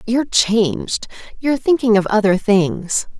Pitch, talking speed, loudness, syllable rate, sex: 215 Hz, 115 wpm, -17 LUFS, 4.5 syllables/s, female